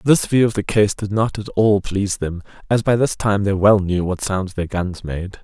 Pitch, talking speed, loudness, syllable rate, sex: 100 Hz, 255 wpm, -19 LUFS, 4.8 syllables/s, male